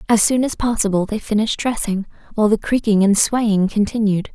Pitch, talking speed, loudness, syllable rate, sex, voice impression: 215 Hz, 180 wpm, -18 LUFS, 5.7 syllables/s, female, feminine, adult-like, relaxed, slightly powerful, bright, soft, slightly fluent, intellectual, calm, slightly friendly, reassuring, elegant, slightly lively, kind, modest